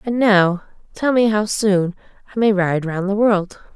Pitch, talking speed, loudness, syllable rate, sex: 200 Hz, 190 wpm, -17 LUFS, 4.2 syllables/s, female